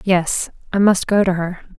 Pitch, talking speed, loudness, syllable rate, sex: 185 Hz, 200 wpm, -18 LUFS, 4.4 syllables/s, female